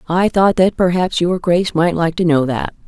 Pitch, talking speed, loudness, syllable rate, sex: 175 Hz, 230 wpm, -15 LUFS, 5.0 syllables/s, female